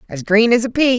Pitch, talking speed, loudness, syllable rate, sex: 230 Hz, 305 wpm, -15 LUFS, 5.8 syllables/s, female